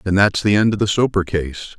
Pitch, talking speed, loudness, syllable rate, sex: 100 Hz, 270 wpm, -17 LUFS, 6.1 syllables/s, male